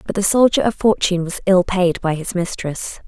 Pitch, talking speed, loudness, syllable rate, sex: 185 Hz, 215 wpm, -18 LUFS, 5.2 syllables/s, female